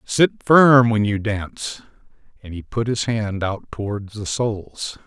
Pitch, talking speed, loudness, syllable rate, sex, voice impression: 110 Hz, 165 wpm, -20 LUFS, 4.0 syllables/s, male, masculine, middle-aged, thick, tensed, powerful, slightly hard, cool, calm, mature, slightly reassuring, wild, lively, slightly strict, slightly sharp